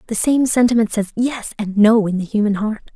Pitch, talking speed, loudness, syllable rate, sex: 220 Hz, 225 wpm, -17 LUFS, 5.4 syllables/s, female